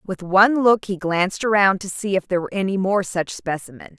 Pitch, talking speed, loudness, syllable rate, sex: 190 Hz, 225 wpm, -20 LUFS, 5.8 syllables/s, female